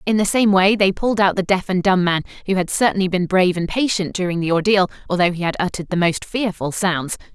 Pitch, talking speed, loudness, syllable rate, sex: 185 Hz, 245 wpm, -18 LUFS, 6.3 syllables/s, female